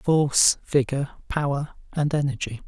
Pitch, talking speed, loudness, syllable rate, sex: 140 Hz, 110 wpm, -23 LUFS, 4.7 syllables/s, male